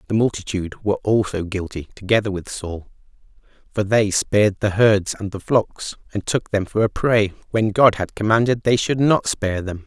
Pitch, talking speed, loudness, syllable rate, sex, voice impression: 105 Hz, 190 wpm, -20 LUFS, 5.1 syllables/s, male, very masculine, very adult-like, slightly thick, cool, sincere, slightly kind